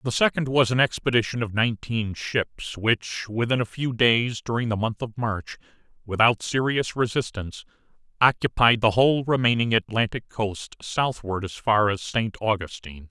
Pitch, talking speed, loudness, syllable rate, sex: 115 Hz, 150 wpm, -23 LUFS, 4.8 syllables/s, male